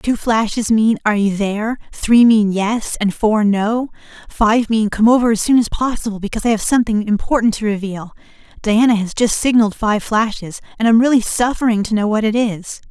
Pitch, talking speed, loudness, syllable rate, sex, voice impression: 220 Hz, 195 wpm, -16 LUFS, 5.4 syllables/s, female, feminine, slightly middle-aged, relaxed, weak, slightly dark, soft, calm, elegant, slightly kind, slightly modest